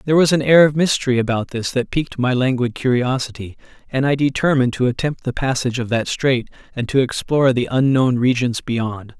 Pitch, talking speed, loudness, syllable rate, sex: 130 Hz, 195 wpm, -18 LUFS, 5.8 syllables/s, male